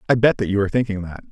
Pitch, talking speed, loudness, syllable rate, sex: 105 Hz, 320 wpm, -20 LUFS, 8.3 syllables/s, male